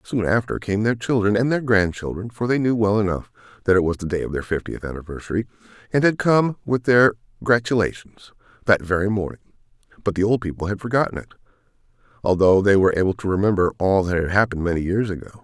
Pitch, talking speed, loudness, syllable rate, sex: 105 Hz, 200 wpm, -21 LUFS, 6.5 syllables/s, male